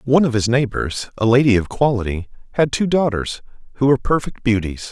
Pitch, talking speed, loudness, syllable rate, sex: 120 Hz, 185 wpm, -18 LUFS, 5.9 syllables/s, male